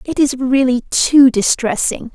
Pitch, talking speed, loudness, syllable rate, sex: 255 Hz, 140 wpm, -14 LUFS, 4.0 syllables/s, female